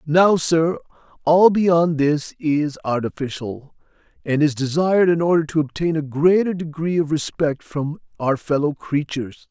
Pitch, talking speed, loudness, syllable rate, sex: 155 Hz, 145 wpm, -20 LUFS, 4.4 syllables/s, male